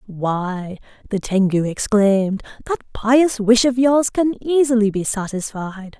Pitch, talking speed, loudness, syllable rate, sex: 220 Hz, 130 wpm, -18 LUFS, 3.9 syllables/s, female